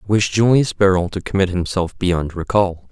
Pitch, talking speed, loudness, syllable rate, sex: 95 Hz, 185 wpm, -18 LUFS, 5.2 syllables/s, male